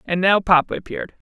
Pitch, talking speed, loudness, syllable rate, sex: 185 Hz, 185 wpm, -18 LUFS, 6.4 syllables/s, female